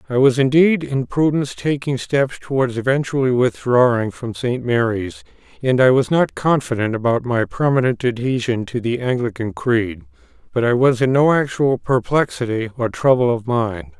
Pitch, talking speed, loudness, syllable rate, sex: 125 Hz, 160 wpm, -18 LUFS, 4.9 syllables/s, male